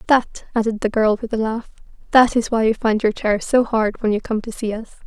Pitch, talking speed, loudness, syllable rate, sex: 225 Hz, 250 wpm, -19 LUFS, 5.4 syllables/s, female